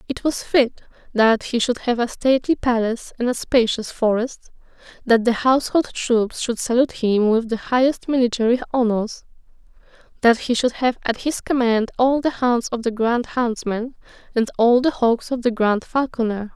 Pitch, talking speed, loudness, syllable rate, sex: 240 Hz, 175 wpm, -20 LUFS, 4.9 syllables/s, female